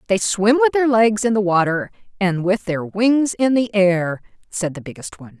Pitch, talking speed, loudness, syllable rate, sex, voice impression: 200 Hz, 210 wpm, -18 LUFS, 4.9 syllables/s, female, feminine, adult-like, tensed, powerful, hard, fluent, intellectual, calm, slightly friendly, elegant, lively, slightly strict, slightly sharp